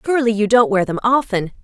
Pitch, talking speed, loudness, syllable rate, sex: 220 Hz, 220 wpm, -16 LUFS, 6.5 syllables/s, female